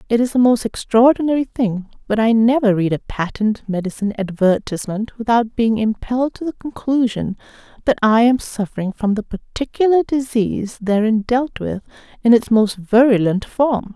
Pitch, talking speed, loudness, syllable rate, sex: 225 Hz, 155 wpm, -18 LUFS, 5.1 syllables/s, female